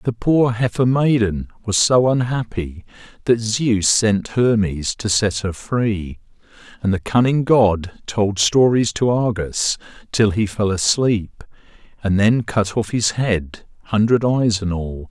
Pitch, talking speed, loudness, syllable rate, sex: 110 Hz, 145 wpm, -18 LUFS, 3.8 syllables/s, male